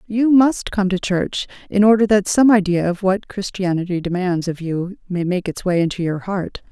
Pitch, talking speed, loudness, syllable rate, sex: 190 Hz, 205 wpm, -18 LUFS, 4.8 syllables/s, female